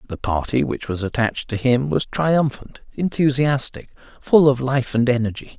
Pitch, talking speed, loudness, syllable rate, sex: 130 Hz, 160 wpm, -20 LUFS, 4.9 syllables/s, male